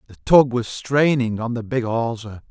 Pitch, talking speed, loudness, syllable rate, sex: 120 Hz, 190 wpm, -19 LUFS, 4.4 syllables/s, male